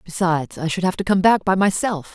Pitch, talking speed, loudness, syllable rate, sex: 180 Hz, 250 wpm, -19 LUFS, 5.9 syllables/s, female